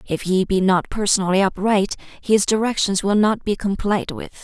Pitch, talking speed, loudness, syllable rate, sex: 195 Hz, 175 wpm, -19 LUFS, 5.0 syllables/s, female